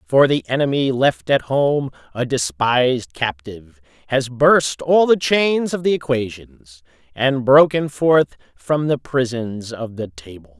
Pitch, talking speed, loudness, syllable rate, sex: 130 Hz, 145 wpm, -18 LUFS, 3.9 syllables/s, male